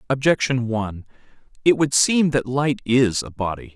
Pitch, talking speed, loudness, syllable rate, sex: 125 Hz, 160 wpm, -20 LUFS, 4.8 syllables/s, male